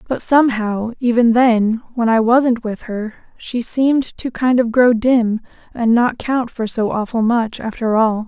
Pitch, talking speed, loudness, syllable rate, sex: 235 Hz, 180 wpm, -16 LUFS, 4.2 syllables/s, female